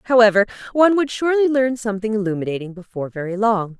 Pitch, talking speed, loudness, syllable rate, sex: 220 Hz, 160 wpm, -19 LUFS, 7.2 syllables/s, female